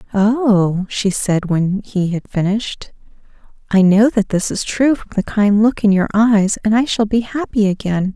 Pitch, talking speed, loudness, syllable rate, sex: 205 Hz, 190 wpm, -16 LUFS, 4.3 syllables/s, female